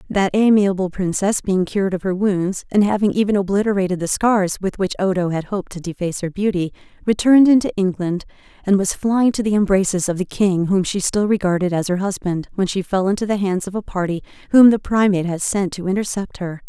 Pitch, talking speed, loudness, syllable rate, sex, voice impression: 195 Hz, 210 wpm, -18 LUFS, 5.9 syllables/s, female, feminine, adult-like, slightly refreshing, slightly sincere, calm, friendly